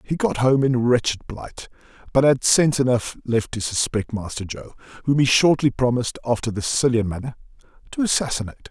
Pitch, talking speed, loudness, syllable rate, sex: 125 Hz, 170 wpm, -21 LUFS, 5.9 syllables/s, male